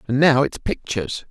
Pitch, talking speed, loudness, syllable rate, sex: 120 Hz, 185 wpm, -20 LUFS, 5.3 syllables/s, male